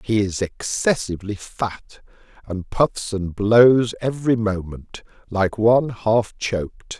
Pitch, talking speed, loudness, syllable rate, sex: 105 Hz, 120 wpm, -20 LUFS, 3.6 syllables/s, male